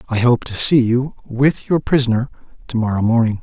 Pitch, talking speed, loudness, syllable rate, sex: 120 Hz, 195 wpm, -17 LUFS, 5.4 syllables/s, male